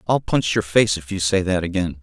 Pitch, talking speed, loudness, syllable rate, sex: 95 Hz, 265 wpm, -20 LUFS, 5.3 syllables/s, male